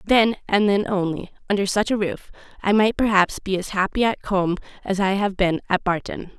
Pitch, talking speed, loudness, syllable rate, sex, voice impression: 195 Hz, 205 wpm, -21 LUFS, 5.3 syllables/s, female, feminine, slightly young, slightly tensed, slightly cute, slightly friendly, slightly lively